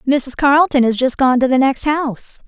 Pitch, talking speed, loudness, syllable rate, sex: 270 Hz, 220 wpm, -15 LUFS, 5.3 syllables/s, female